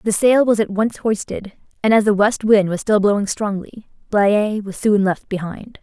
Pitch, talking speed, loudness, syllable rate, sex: 210 Hz, 205 wpm, -18 LUFS, 4.6 syllables/s, female